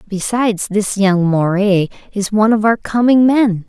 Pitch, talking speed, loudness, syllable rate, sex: 205 Hz, 165 wpm, -14 LUFS, 4.6 syllables/s, female